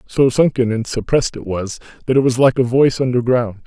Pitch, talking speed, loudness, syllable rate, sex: 125 Hz, 215 wpm, -16 LUFS, 5.9 syllables/s, male